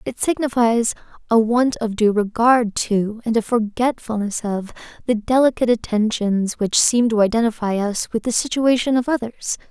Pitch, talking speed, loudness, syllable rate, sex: 230 Hz, 155 wpm, -19 LUFS, 4.8 syllables/s, female